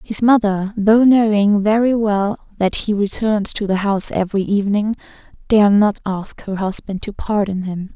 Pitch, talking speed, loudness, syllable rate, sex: 205 Hz, 165 wpm, -17 LUFS, 4.8 syllables/s, female